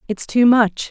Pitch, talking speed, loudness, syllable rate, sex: 220 Hz, 200 wpm, -15 LUFS, 4.1 syllables/s, female